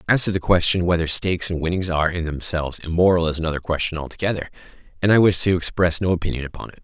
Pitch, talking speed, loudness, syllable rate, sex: 85 Hz, 220 wpm, -20 LUFS, 7.2 syllables/s, male